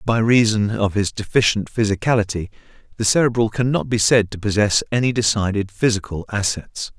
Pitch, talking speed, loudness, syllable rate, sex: 105 Hz, 155 wpm, -19 LUFS, 5.4 syllables/s, male